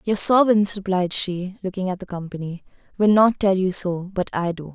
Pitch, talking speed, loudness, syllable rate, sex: 190 Hz, 200 wpm, -21 LUFS, 5.0 syllables/s, female